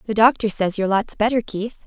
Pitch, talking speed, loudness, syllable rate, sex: 215 Hz, 225 wpm, -20 LUFS, 6.1 syllables/s, female